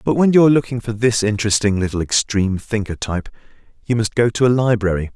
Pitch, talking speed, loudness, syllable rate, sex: 110 Hz, 210 wpm, -17 LUFS, 6.7 syllables/s, male